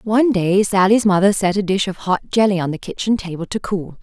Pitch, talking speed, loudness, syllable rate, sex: 195 Hz, 240 wpm, -17 LUFS, 5.6 syllables/s, female